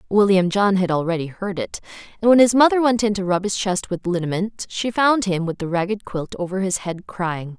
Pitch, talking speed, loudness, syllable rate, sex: 195 Hz, 230 wpm, -20 LUFS, 5.4 syllables/s, female